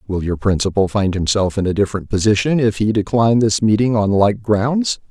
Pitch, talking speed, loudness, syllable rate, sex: 105 Hz, 200 wpm, -16 LUFS, 5.5 syllables/s, male